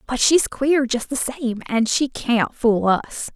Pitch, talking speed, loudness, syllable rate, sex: 250 Hz, 195 wpm, -20 LUFS, 3.5 syllables/s, female